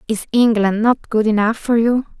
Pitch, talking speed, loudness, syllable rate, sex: 225 Hz, 190 wpm, -16 LUFS, 4.8 syllables/s, female